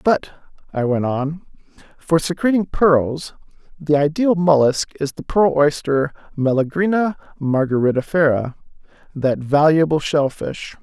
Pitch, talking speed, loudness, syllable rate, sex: 150 Hz, 105 wpm, -18 LUFS, 4.2 syllables/s, male